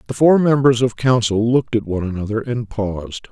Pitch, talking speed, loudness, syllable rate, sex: 115 Hz, 200 wpm, -17 LUFS, 5.8 syllables/s, male